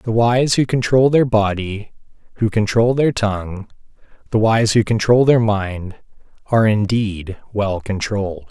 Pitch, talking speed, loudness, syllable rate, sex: 110 Hz, 140 wpm, -17 LUFS, 4.2 syllables/s, male